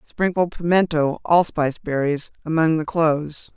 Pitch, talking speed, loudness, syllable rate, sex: 160 Hz, 120 wpm, -20 LUFS, 4.7 syllables/s, female